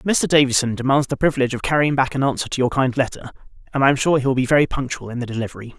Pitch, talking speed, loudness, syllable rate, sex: 130 Hz, 270 wpm, -19 LUFS, 7.5 syllables/s, male